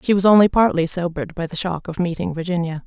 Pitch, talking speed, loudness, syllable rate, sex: 175 Hz, 230 wpm, -19 LUFS, 6.5 syllables/s, female